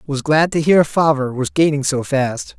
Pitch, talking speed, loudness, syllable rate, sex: 140 Hz, 210 wpm, -16 LUFS, 4.5 syllables/s, male